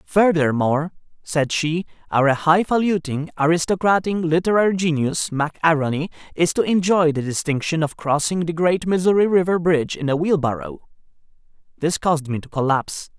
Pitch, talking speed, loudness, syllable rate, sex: 165 Hz, 135 wpm, -20 LUFS, 5.3 syllables/s, male